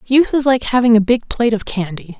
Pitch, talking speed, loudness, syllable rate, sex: 230 Hz, 245 wpm, -15 LUFS, 5.8 syllables/s, female